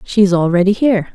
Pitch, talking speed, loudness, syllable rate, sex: 195 Hz, 160 wpm, -13 LUFS, 6.0 syllables/s, female